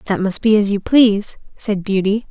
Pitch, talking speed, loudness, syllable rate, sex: 205 Hz, 210 wpm, -16 LUFS, 5.1 syllables/s, female